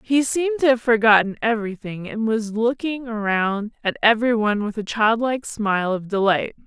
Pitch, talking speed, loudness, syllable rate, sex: 225 Hz, 170 wpm, -20 LUFS, 5.3 syllables/s, female